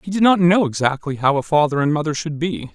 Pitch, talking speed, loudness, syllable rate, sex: 155 Hz, 260 wpm, -18 LUFS, 6.0 syllables/s, male